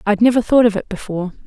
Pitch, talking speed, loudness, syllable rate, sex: 215 Hz, 245 wpm, -16 LUFS, 7.3 syllables/s, female